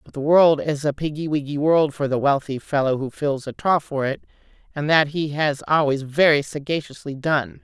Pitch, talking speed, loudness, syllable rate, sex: 145 Hz, 205 wpm, -21 LUFS, 5.0 syllables/s, female